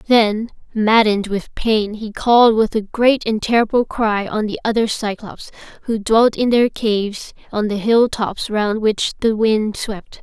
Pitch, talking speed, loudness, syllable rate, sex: 220 Hz, 175 wpm, -17 LUFS, 4.3 syllables/s, female